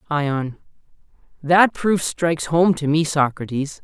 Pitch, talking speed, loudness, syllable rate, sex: 155 Hz, 125 wpm, -19 LUFS, 3.9 syllables/s, male